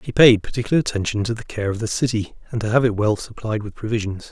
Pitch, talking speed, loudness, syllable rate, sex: 110 Hz, 250 wpm, -21 LUFS, 6.7 syllables/s, male